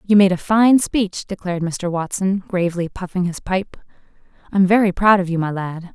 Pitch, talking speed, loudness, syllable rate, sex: 185 Hz, 200 wpm, -18 LUFS, 5.3 syllables/s, female